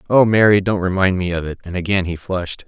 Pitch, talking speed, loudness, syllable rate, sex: 95 Hz, 245 wpm, -17 LUFS, 6.2 syllables/s, male